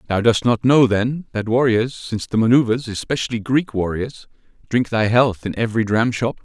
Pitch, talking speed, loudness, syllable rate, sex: 115 Hz, 175 wpm, -19 LUFS, 5.3 syllables/s, male